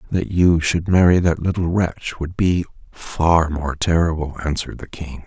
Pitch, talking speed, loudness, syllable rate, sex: 85 Hz, 170 wpm, -19 LUFS, 4.4 syllables/s, male